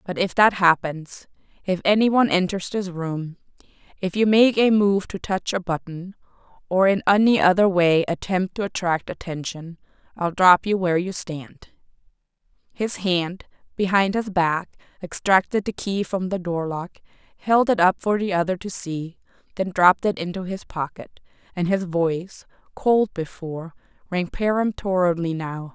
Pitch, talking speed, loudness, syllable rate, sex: 185 Hz, 155 wpm, -22 LUFS, 4.6 syllables/s, female